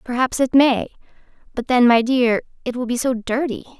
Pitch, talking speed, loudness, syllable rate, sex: 250 Hz, 190 wpm, -18 LUFS, 5.3 syllables/s, female